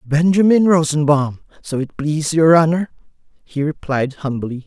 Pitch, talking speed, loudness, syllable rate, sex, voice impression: 155 Hz, 130 wpm, -16 LUFS, 4.5 syllables/s, male, masculine, slightly gender-neutral, adult-like, tensed, slightly bright, clear, intellectual, calm, friendly, unique, slightly lively, kind